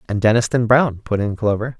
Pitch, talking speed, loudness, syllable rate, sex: 110 Hz, 200 wpm, -18 LUFS, 6.3 syllables/s, male